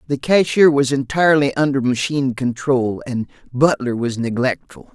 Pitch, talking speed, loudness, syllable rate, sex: 135 Hz, 135 wpm, -18 LUFS, 5.0 syllables/s, male